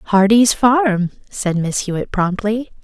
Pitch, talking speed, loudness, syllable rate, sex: 210 Hz, 125 wpm, -16 LUFS, 4.0 syllables/s, female